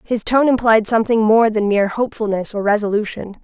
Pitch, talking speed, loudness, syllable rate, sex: 220 Hz, 175 wpm, -16 LUFS, 6.1 syllables/s, female